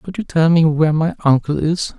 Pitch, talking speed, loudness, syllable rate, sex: 155 Hz, 240 wpm, -16 LUFS, 5.2 syllables/s, male